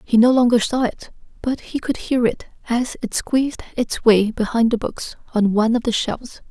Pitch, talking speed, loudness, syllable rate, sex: 235 Hz, 210 wpm, -19 LUFS, 5.1 syllables/s, female